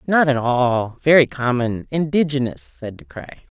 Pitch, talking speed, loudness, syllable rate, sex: 135 Hz, 150 wpm, -18 LUFS, 4.3 syllables/s, female